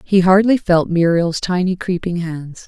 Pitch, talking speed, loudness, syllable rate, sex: 180 Hz, 155 wpm, -16 LUFS, 4.3 syllables/s, female